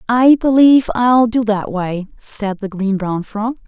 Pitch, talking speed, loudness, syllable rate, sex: 220 Hz, 180 wpm, -15 LUFS, 4.0 syllables/s, female